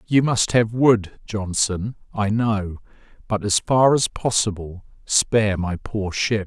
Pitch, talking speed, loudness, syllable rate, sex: 105 Hz, 150 wpm, -21 LUFS, 3.6 syllables/s, male